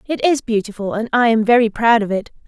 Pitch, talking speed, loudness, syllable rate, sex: 225 Hz, 245 wpm, -16 LUFS, 5.9 syllables/s, female